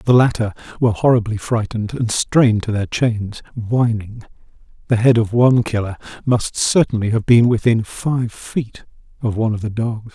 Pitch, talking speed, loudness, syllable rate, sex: 115 Hz, 165 wpm, -18 LUFS, 5.0 syllables/s, male